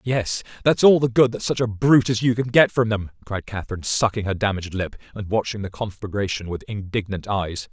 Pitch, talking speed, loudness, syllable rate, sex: 110 Hz, 220 wpm, -22 LUFS, 5.8 syllables/s, male